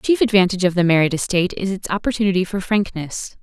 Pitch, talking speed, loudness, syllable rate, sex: 185 Hz, 210 wpm, -19 LUFS, 6.8 syllables/s, female